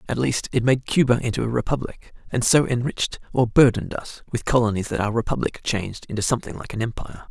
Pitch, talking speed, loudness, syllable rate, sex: 120 Hz, 205 wpm, -22 LUFS, 6.5 syllables/s, male